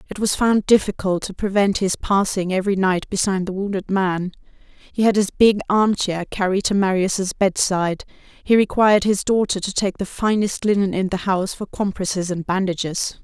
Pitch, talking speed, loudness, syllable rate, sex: 195 Hz, 180 wpm, -20 LUFS, 5.3 syllables/s, female